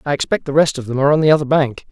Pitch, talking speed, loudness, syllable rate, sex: 145 Hz, 345 wpm, -16 LUFS, 7.9 syllables/s, male